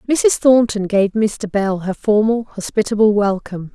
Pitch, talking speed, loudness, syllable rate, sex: 210 Hz, 145 wpm, -16 LUFS, 4.5 syllables/s, female